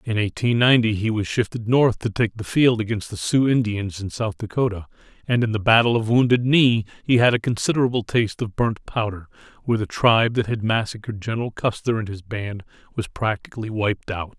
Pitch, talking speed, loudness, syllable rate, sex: 110 Hz, 200 wpm, -21 LUFS, 5.7 syllables/s, male